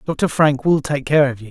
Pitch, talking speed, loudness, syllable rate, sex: 145 Hz, 280 wpm, -17 LUFS, 5.0 syllables/s, male